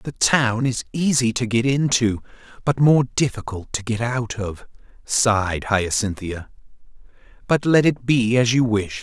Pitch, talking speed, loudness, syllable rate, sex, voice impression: 120 Hz, 155 wpm, -20 LUFS, 4.2 syllables/s, male, very masculine, very adult-like, middle-aged, thick, tensed, powerful, bright, slightly soft, clear, fluent, slightly raspy, very cool, very intellectual, refreshing, very sincere, very calm, mature, very friendly, very reassuring, unique, elegant, wild, sweet, lively, kind